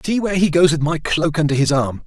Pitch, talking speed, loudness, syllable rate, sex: 160 Hz, 290 wpm, -17 LUFS, 6.2 syllables/s, male